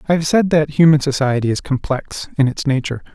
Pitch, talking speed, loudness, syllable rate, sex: 145 Hz, 210 wpm, -17 LUFS, 6.1 syllables/s, male